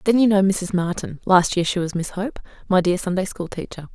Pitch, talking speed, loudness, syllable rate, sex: 185 Hz, 245 wpm, -21 LUFS, 5.4 syllables/s, female